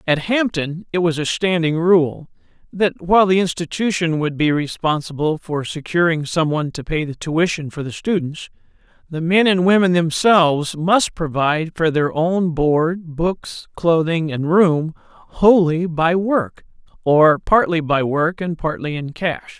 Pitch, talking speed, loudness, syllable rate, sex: 165 Hz, 155 wpm, -18 LUFS, 4.2 syllables/s, male